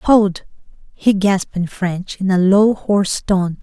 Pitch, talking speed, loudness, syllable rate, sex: 195 Hz, 165 wpm, -16 LUFS, 3.9 syllables/s, female